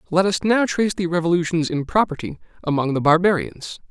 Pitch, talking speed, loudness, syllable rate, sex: 175 Hz, 170 wpm, -20 LUFS, 5.9 syllables/s, male